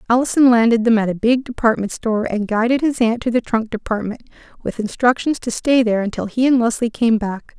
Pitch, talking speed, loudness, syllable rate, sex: 230 Hz, 215 wpm, -18 LUFS, 5.8 syllables/s, female